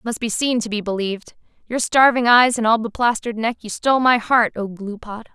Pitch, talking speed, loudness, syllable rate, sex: 230 Hz, 200 wpm, -18 LUFS, 5.6 syllables/s, female